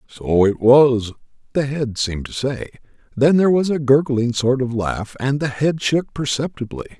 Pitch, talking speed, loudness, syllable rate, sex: 130 Hz, 180 wpm, -18 LUFS, 4.8 syllables/s, male